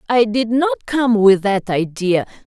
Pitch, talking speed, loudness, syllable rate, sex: 215 Hz, 165 wpm, -16 LUFS, 4.0 syllables/s, female